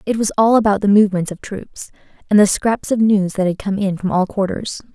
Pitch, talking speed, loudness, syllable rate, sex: 200 Hz, 240 wpm, -16 LUFS, 5.6 syllables/s, female